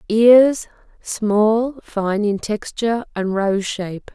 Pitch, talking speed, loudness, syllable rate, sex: 215 Hz, 100 wpm, -18 LUFS, 3.2 syllables/s, female